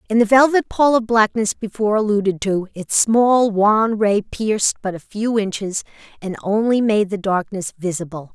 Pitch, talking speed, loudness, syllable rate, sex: 210 Hz, 170 wpm, -18 LUFS, 4.8 syllables/s, female